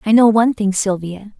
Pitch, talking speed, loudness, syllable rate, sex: 210 Hz, 215 wpm, -15 LUFS, 5.6 syllables/s, female